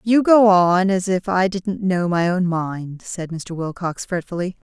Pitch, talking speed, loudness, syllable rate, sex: 185 Hz, 190 wpm, -19 LUFS, 4.0 syllables/s, female